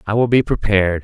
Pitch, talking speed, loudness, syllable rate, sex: 105 Hz, 230 wpm, -16 LUFS, 6.4 syllables/s, male